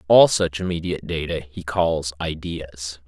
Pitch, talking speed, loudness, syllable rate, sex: 80 Hz, 135 wpm, -22 LUFS, 4.4 syllables/s, male